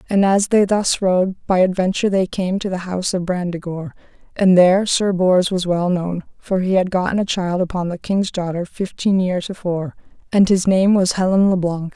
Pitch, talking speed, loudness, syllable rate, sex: 185 Hz, 210 wpm, -18 LUFS, 5.1 syllables/s, female